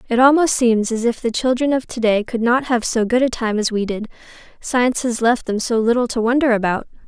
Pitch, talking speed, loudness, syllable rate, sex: 235 Hz, 245 wpm, -18 LUFS, 5.6 syllables/s, female